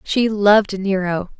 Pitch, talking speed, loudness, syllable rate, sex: 200 Hz, 130 wpm, -17 LUFS, 4.0 syllables/s, female